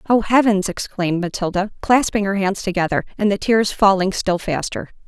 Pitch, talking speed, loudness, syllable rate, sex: 200 Hz, 165 wpm, -19 LUFS, 5.3 syllables/s, female